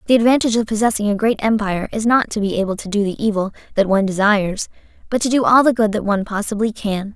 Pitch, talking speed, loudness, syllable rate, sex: 215 Hz, 245 wpm, -18 LUFS, 7.0 syllables/s, female